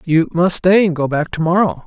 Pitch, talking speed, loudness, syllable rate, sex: 170 Hz, 255 wpm, -15 LUFS, 5.2 syllables/s, male